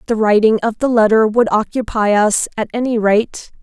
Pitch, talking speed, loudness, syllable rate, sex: 220 Hz, 180 wpm, -15 LUFS, 5.1 syllables/s, female